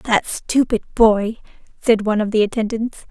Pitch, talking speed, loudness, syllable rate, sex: 220 Hz, 155 wpm, -18 LUFS, 4.8 syllables/s, female